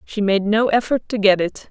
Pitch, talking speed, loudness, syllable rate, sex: 210 Hz, 245 wpm, -18 LUFS, 5.0 syllables/s, female